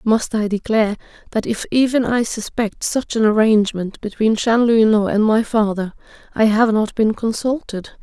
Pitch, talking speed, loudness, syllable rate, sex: 220 Hz, 155 wpm, -18 LUFS, 4.8 syllables/s, female